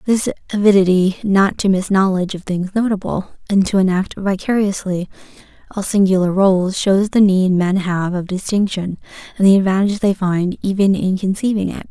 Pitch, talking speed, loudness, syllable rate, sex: 190 Hz, 160 wpm, -16 LUFS, 5.3 syllables/s, female